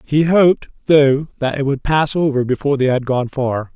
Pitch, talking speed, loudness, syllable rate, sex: 140 Hz, 210 wpm, -16 LUFS, 5.1 syllables/s, male